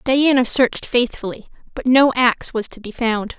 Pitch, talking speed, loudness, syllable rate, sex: 240 Hz, 175 wpm, -17 LUFS, 5.0 syllables/s, female